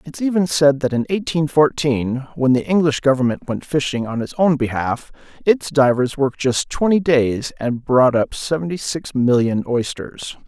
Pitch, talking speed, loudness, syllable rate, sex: 140 Hz, 170 wpm, -18 LUFS, 4.6 syllables/s, male